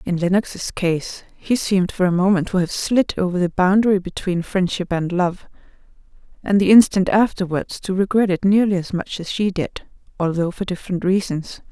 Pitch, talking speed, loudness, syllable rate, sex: 185 Hz, 180 wpm, -19 LUFS, 5.1 syllables/s, female